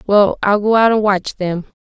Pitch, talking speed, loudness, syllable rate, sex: 205 Hz, 225 wpm, -15 LUFS, 4.6 syllables/s, female